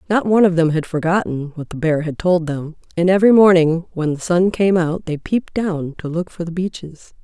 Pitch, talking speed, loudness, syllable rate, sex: 170 Hz, 230 wpm, -17 LUFS, 5.4 syllables/s, female